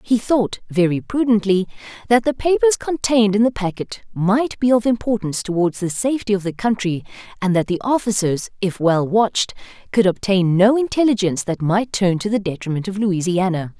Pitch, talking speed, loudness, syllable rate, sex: 205 Hz, 175 wpm, -19 LUFS, 5.5 syllables/s, female